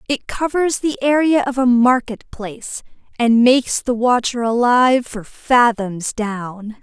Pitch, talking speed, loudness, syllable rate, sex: 245 Hz, 140 wpm, -16 LUFS, 4.1 syllables/s, female